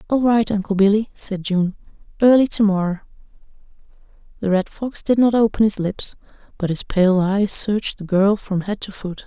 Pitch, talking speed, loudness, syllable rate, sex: 200 Hz, 175 wpm, -19 LUFS, 5.0 syllables/s, female